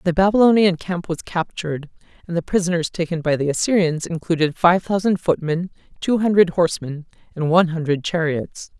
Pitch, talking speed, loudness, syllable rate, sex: 170 Hz, 155 wpm, -19 LUFS, 5.6 syllables/s, female